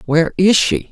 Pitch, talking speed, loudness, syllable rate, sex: 180 Hz, 195 wpm, -14 LUFS, 5.4 syllables/s, female